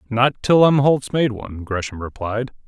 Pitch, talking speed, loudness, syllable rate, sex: 120 Hz, 155 wpm, -19 LUFS, 4.9 syllables/s, male